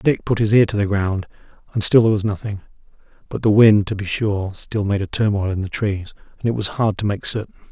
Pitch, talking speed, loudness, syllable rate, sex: 105 Hz, 250 wpm, -19 LUFS, 5.9 syllables/s, male